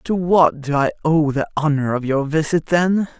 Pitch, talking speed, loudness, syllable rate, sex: 155 Hz, 205 wpm, -18 LUFS, 4.5 syllables/s, male